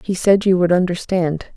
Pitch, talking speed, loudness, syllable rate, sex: 180 Hz, 190 wpm, -17 LUFS, 4.8 syllables/s, female